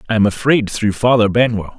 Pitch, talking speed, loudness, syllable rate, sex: 110 Hz, 200 wpm, -15 LUFS, 5.6 syllables/s, male